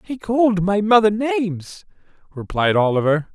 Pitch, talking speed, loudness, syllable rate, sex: 185 Hz, 125 wpm, -18 LUFS, 4.8 syllables/s, male